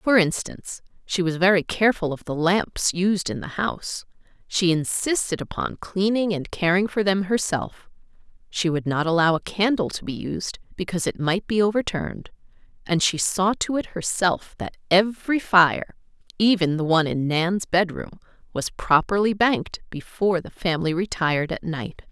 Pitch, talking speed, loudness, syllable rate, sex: 185 Hz, 160 wpm, -23 LUFS, 5.0 syllables/s, female